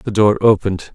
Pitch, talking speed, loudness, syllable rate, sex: 100 Hz, 190 wpm, -15 LUFS, 5.8 syllables/s, male